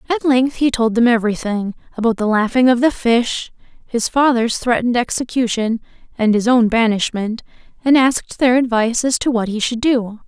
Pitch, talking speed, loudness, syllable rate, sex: 235 Hz, 165 wpm, -16 LUFS, 5.3 syllables/s, female